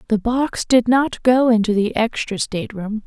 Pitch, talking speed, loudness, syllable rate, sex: 230 Hz, 195 wpm, -18 LUFS, 4.6 syllables/s, female